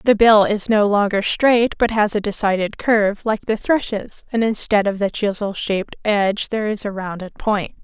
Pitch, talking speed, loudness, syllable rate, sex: 210 Hz, 200 wpm, -18 LUFS, 5.0 syllables/s, female